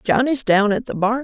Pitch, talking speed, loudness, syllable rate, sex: 230 Hz, 245 wpm, -18 LUFS, 5.1 syllables/s, female